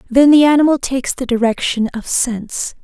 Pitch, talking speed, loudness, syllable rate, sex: 255 Hz, 170 wpm, -15 LUFS, 5.4 syllables/s, female